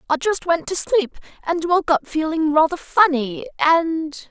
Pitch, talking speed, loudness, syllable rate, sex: 320 Hz, 165 wpm, -19 LUFS, 4.1 syllables/s, female